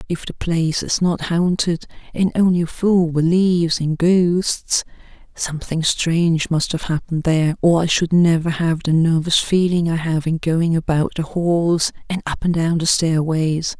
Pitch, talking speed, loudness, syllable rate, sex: 165 Hz, 165 wpm, -18 LUFS, 4.5 syllables/s, female